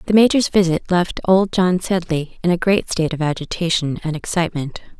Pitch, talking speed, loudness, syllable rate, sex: 175 Hz, 180 wpm, -18 LUFS, 5.3 syllables/s, female